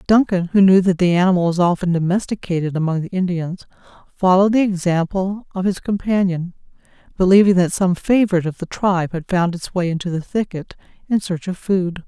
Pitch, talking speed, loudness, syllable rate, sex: 185 Hz, 180 wpm, -18 LUFS, 5.8 syllables/s, female